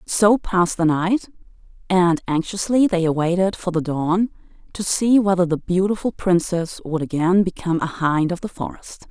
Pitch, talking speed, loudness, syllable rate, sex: 180 Hz, 165 wpm, -20 LUFS, 4.8 syllables/s, female